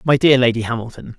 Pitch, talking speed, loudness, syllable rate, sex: 125 Hz, 205 wpm, -16 LUFS, 6.4 syllables/s, male